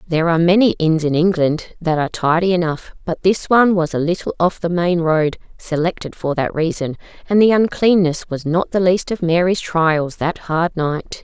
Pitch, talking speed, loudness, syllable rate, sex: 170 Hz, 185 wpm, -17 LUFS, 5.0 syllables/s, female